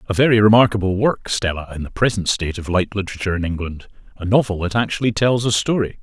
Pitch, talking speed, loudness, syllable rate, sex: 100 Hz, 200 wpm, -18 LUFS, 6.8 syllables/s, male